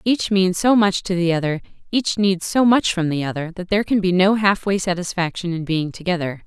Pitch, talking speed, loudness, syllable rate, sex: 185 Hz, 225 wpm, -19 LUFS, 5.5 syllables/s, female